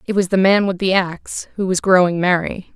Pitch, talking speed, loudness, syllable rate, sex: 185 Hz, 240 wpm, -17 LUFS, 5.5 syllables/s, female